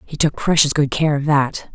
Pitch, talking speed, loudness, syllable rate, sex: 145 Hz, 240 wpm, -17 LUFS, 4.9 syllables/s, female